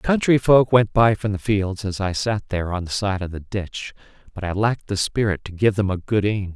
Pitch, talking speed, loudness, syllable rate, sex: 100 Hz, 255 wpm, -21 LUFS, 5.4 syllables/s, male